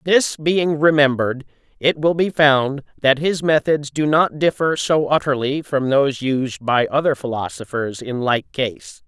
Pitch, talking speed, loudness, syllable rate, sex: 140 Hz, 160 wpm, -18 LUFS, 4.3 syllables/s, male